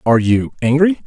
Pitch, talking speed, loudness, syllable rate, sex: 135 Hz, 170 wpm, -15 LUFS, 5.9 syllables/s, male